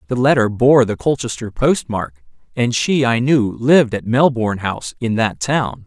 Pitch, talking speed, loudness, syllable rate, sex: 120 Hz, 185 wpm, -16 LUFS, 4.7 syllables/s, male